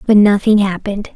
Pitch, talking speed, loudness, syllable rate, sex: 205 Hz, 155 wpm, -13 LUFS, 5.9 syllables/s, female